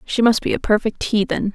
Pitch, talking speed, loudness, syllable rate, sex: 215 Hz, 235 wpm, -19 LUFS, 5.5 syllables/s, female